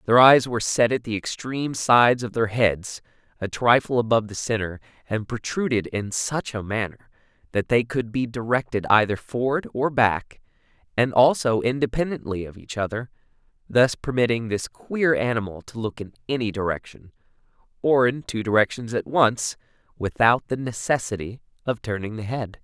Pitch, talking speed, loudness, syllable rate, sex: 115 Hz, 160 wpm, -23 LUFS, 5.1 syllables/s, male